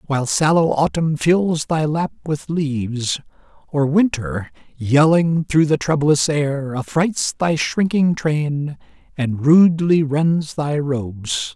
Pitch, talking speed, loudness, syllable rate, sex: 150 Hz, 125 wpm, -18 LUFS, 3.6 syllables/s, male